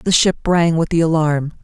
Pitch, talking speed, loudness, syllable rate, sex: 165 Hz, 220 wpm, -16 LUFS, 4.6 syllables/s, female